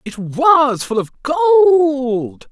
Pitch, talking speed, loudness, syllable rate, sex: 275 Hz, 120 wpm, -14 LUFS, 3.8 syllables/s, male